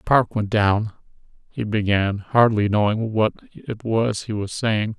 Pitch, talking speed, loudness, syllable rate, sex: 110 Hz, 155 wpm, -21 LUFS, 4.0 syllables/s, male